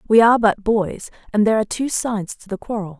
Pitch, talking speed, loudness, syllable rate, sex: 215 Hz, 240 wpm, -19 LUFS, 6.5 syllables/s, female